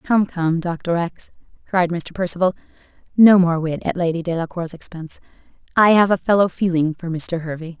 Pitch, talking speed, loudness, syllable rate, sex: 175 Hz, 170 wpm, -19 LUFS, 5.3 syllables/s, female